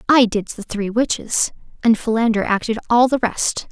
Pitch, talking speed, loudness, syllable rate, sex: 225 Hz, 180 wpm, -18 LUFS, 4.9 syllables/s, female